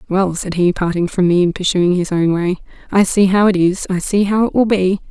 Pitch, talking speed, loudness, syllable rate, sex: 185 Hz, 245 wpm, -15 LUFS, 5.4 syllables/s, female